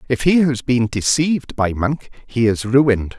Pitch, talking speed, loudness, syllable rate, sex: 125 Hz, 190 wpm, -17 LUFS, 4.5 syllables/s, male